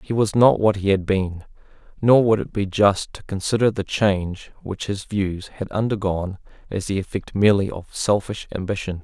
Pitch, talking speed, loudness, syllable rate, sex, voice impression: 100 Hz, 185 wpm, -21 LUFS, 5.0 syllables/s, male, very masculine, very adult-like, middle-aged, thick, slightly tensed, slightly weak, slightly dark, slightly soft, slightly muffled, fluent, cool, very intellectual, slightly refreshing, very sincere, very calm, mature, very friendly, very reassuring, unique, slightly elegant, wild, very sweet, slightly lively, kind, slightly modest